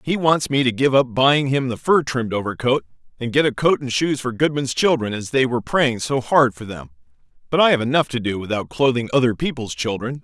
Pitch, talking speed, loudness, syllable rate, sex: 130 Hz, 235 wpm, -19 LUFS, 5.7 syllables/s, male